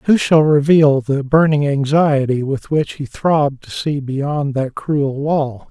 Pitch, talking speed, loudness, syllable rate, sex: 145 Hz, 170 wpm, -16 LUFS, 3.7 syllables/s, male